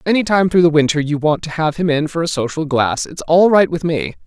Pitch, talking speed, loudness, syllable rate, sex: 160 Hz, 280 wpm, -16 LUFS, 5.7 syllables/s, male